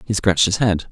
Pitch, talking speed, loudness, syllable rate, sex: 100 Hz, 260 wpm, -17 LUFS, 6.4 syllables/s, male